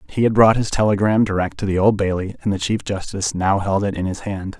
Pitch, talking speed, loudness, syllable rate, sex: 100 Hz, 260 wpm, -19 LUFS, 6.0 syllables/s, male